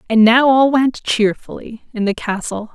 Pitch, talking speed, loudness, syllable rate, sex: 235 Hz, 175 wpm, -15 LUFS, 4.4 syllables/s, female